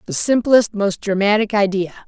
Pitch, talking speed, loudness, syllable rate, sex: 205 Hz, 145 wpm, -17 LUFS, 5.0 syllables/s, female